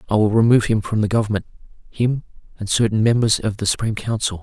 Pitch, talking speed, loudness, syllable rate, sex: 110 Hz, 190 wpm, -19 LUFS, 7.2 syllables/s, male